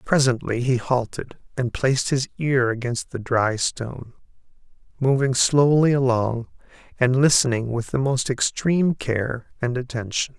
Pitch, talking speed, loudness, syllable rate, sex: 125 Hz, 135 wpm, -22 LUFS, 4.5 syllables/s, male